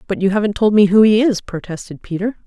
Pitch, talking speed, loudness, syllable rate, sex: 200 Hz, 245 wpm, -15 LUFS, 6.3 syllables/s, female